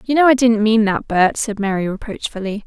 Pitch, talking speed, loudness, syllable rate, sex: 220 Hz, 225 wpm, -17 LUFS, 5.5 syllables/s, female